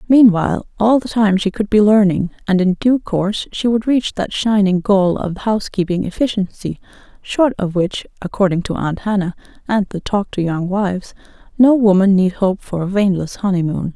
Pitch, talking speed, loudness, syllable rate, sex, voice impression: 200 Hz, 170 wpm, -16 LUFS, 5.1 syllables/s, female, feminine, slightly middle-aged, slightly relaxed, soft, slightly muffled, intellectual, calm, elegant, sharp, modest